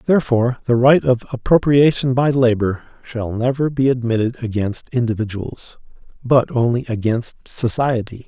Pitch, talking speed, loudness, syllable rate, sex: 125 Hz, 125 wpm, -18 LUFS, 4.8 syllables/s, male